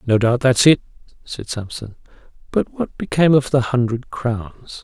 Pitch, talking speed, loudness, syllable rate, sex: 125 Hz, 160 wpm, -18 LUFS, 4.6 syllables/s, male